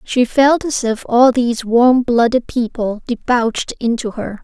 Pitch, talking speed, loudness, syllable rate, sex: 240 Hz, 160 wpm, -15 LUFS, 4.3 syllables/s, female